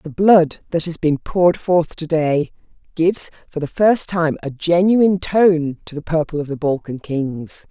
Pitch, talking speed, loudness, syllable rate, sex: 165 Hz, 185 wpm, -18 LUFS, 4.4 syllables/s, female